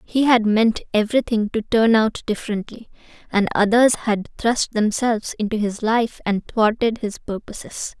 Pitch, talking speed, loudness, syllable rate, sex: 220 Hz, 150 wpm, -20 LUFS, 4.7 syllables/s, female